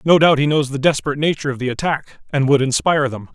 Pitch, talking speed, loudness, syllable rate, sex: 140 Hz, 250 wpm, -17 LUFS, 7.0 syllables/s, male